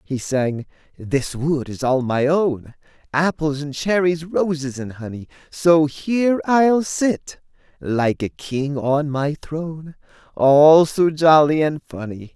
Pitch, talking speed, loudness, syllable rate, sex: 150 Hz, 140 wpm, -19 LUFS, 3.5 syllables/s, male